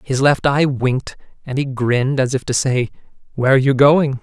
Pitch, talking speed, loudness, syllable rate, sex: 135 Hz, 215 wpm, -17 LUFS, 5.6 syllables/s, male